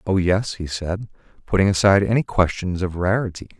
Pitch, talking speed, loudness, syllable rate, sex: 95 Hz, 165 wpm, -21 LUFS, 5.6 syllables/s, male